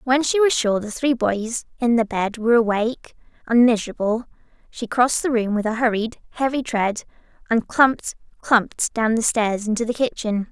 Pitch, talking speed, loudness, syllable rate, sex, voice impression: 230 Hz, 185 wpm, -20 LUFS, 5.2 syllables/s, female, feminine, young, tensed, powerful, bright, clear, slightly nasal, cute, friendly, slightly sweet, lively, slightly intense